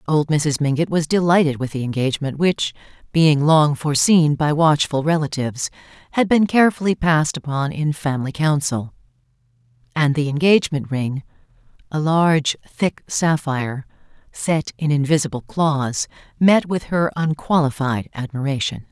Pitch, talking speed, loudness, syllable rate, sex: 150 Hz, 125 wpm, -19 LUFS, 5.0 syllables/s, female